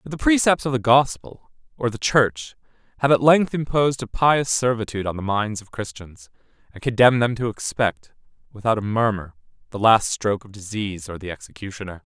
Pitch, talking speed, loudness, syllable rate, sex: 115 Hz, 185 wpm, -21 LUFS, 5.5 syllables/s, male